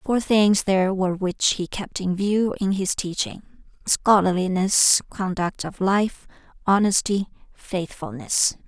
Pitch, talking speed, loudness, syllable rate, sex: 195 Hz, 120 wpm, -22 LUFS, 4.0 syllables/s, female